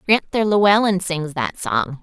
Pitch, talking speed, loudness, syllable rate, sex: 180 Hz, 150 wpm, -18 LUFS, 5.8 syllables/s, female